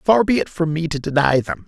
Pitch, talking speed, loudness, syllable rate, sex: 160 Hz, 285 wpm, -19 LUFS, 5.7 syllables/s, male